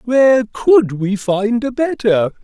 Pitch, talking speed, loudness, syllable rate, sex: 230 Hz, 150 wpm, -15 LUFS, 3.6 syllables/s, male